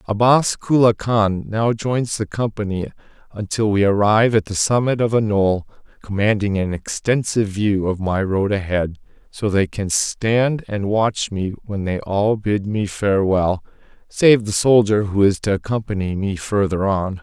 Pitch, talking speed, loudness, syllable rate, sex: 105 Hz, 165 wpm, -19 LUFS, 4.4 syllables/s, male